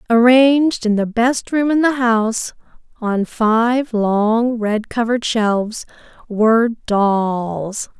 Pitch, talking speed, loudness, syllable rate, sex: 225 Hz, 120 wpm, -16 LUFS, 3.4 syllables/s, female